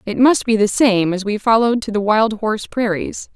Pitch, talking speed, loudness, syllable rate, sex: 215 Hz, 230 wpm, -16 LUFS, 5.3 syllables/s, female